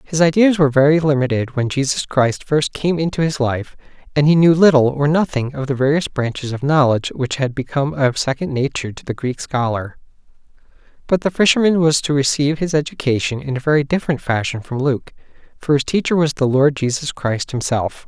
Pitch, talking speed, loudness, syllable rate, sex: 140 Hz, 195 wpm, -17 LUFS, 5.7 syllables/s, male